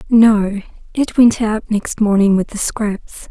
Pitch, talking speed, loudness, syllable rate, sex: 215 Hz, 165 wpm, -15 LUFS, 3.8 syllables/s, female